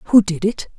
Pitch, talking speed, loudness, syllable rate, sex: 200 Hz, 230 wpm, -18 LUFS, 4.4 syllables/s, female